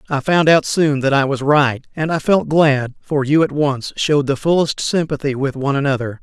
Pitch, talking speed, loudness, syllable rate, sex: 145 Hz, 220 wpm, -16 LUFS, 5.1 syllables/s, male